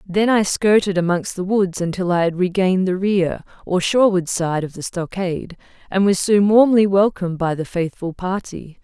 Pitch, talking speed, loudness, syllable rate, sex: 185 Hz, 185 wpm, -18 LUFS, 5.1 syllables/s, female